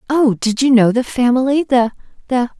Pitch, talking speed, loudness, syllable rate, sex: 250 Hz, 160 wpm, -15 LUFS, 5.2 syllables/s, female